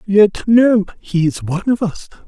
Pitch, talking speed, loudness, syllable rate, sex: 200 Hz, 160 wpm, -15 LUFS, 4.4 syllables/s, male